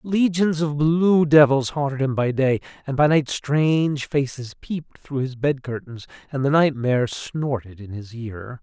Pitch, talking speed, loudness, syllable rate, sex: 140 Hz, 175 wpm, -21 LUFS, 4.4 syllables/s, male